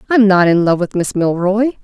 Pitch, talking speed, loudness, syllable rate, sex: 195 Hz, 230 wpm, -14 LUFS, 5.0 syllables/s, female